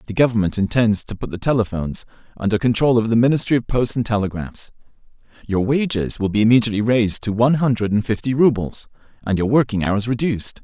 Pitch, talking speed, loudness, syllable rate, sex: 110 Hz, 185 wpm, -19 LUFS, 6.4 syllables/s, male